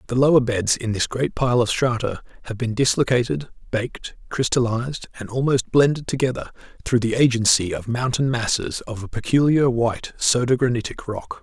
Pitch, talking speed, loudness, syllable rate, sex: 120 Hz, 165 wpm, -21 LUFS, 5.3 syllables/s, male